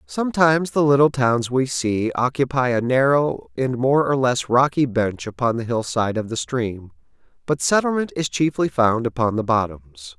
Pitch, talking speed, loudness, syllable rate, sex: 125 Hz, 175 wpm, -20 LUFS, 4.7 syllables/s, male